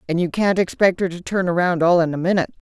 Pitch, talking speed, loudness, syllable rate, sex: 180 Hz, 270 wpm, -19 LUFS, 6.2 syllables/s, female